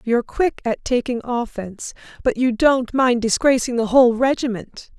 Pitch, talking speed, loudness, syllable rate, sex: 240 Hz, 155 wpm, -19 LUFS, 4.9 syllables/s, female